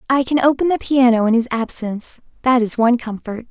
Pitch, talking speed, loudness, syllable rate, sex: 245 Hz, 190 wpm, -17 LUFS, 5.9 syllables/s, female